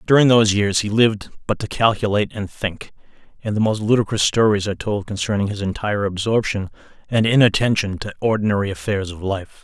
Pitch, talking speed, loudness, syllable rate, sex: 105 Hz, 175 wpm, -19 LUFS, 6.1 syllables/s, male